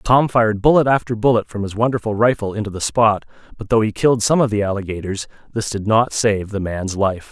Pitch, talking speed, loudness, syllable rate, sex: 110 Hz, 220 wpm, -18 LUFS, 5.8 syllables/s, male